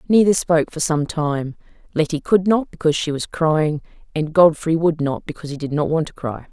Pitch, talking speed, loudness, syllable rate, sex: 160 Hz, 210 wpm, -19 LUFS, 5.5 syllables/s, female